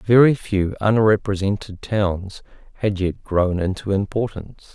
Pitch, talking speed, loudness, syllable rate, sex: 100 Hz, 115 wpm, -20 LUFS, 4.2 syllables/s, male